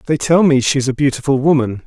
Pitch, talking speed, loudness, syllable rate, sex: 140 Hz, 225 wpm, -14 LUFS, 5.9 syllables/s, male